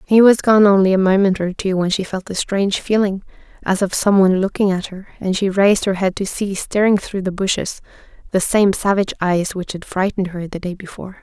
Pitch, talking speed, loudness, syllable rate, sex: 195 Hz, 230 wpm, -17 LUFS, 5.8 syllables/s, female